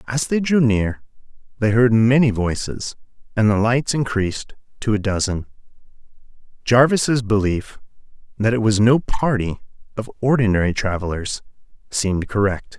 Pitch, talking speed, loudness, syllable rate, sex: 115 Hz, 125 wpm, -19 LUFS, 4.8 syllables/s, male